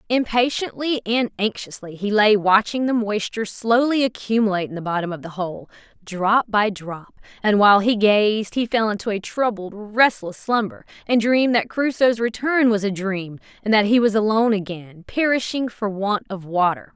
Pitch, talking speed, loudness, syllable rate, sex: 215 Hz, 175 wpm, -20 LUFS, 5.0 syllables/s, female